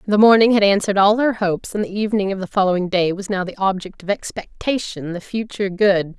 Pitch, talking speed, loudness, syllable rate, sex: 200 Hz, 225 wpm, -18 LUFS, 6.2 syllables/s, female